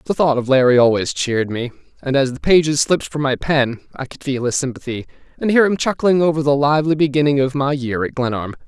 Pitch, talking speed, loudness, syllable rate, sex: 140 Hz, 230 wpm, -17 LUFS, 6.2 syllables/s, male